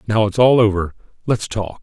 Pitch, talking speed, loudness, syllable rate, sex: 105 Hz, 195 wpm, -17 LUFS, 5.2 syllables/s, male